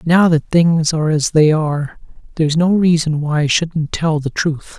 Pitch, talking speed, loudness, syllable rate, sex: 160 Hz, 200 wpm, -15 LUFS, 4.6 syllables/s, male